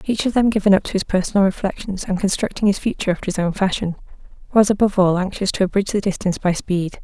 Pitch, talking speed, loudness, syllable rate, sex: 195 Hz, 230 wpm, -19 LUFS, 7.1 syllables/s, female